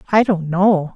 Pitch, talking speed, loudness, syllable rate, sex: 185 Hz, 190 wpm, -16 LUFS, 4.2 syllables/s, female